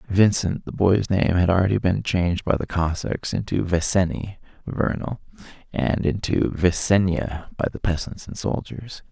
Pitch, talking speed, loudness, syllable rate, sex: 95 Hz, 145 wpm, -23 LUFS, 4.6 syllables/s, male